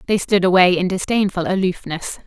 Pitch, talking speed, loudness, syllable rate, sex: 185 Hz, 160 wpm, -18 LUFS, 5.5 syllables/s, female